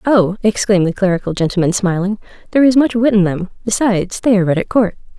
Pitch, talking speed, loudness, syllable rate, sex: 200 Hz, 210 wpm, -15 LUFS, 6.7 syllables/s, female